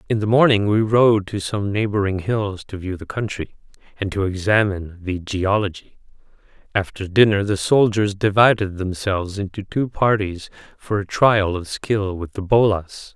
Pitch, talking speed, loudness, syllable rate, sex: 100 Hz, 160 wpm, -20 LUFS, 4.7 syllables/s, male